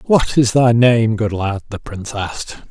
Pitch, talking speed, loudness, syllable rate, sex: 110 Hz, 200 wpm, -16 LUFS, 4.5 syllables/s, male